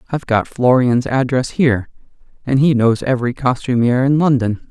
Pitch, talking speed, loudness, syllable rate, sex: 125 Hz, 155 wpm, -16 LUFS, 5.4 syllables/s, male